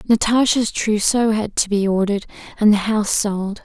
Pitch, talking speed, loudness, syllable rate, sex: 210 Hz, 165 wpm, -18 LUFS, 5.2 syllables/s, female